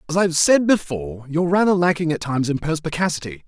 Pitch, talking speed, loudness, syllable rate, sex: 160 Hz, 205 wpm, -20 LUFS, 6.8 syllables/s, male